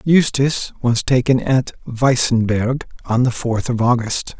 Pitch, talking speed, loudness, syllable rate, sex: 125 Hz, 135 wpm, -17 LUFS, 4.3 syllables/s, male